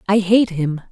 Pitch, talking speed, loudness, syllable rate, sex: 190 Hz, 200 wpm, -17 LUFS, 4.3 syllables/s, female